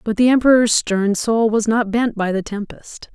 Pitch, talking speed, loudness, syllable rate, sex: 220 Hz, 210 wpm, -17 LUFS, 4.6 syllables/s, female